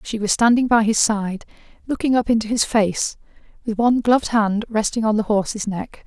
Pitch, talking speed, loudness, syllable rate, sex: 220 Hz, 200 wpm, -19 LUFS, 5.4 syllables/s, female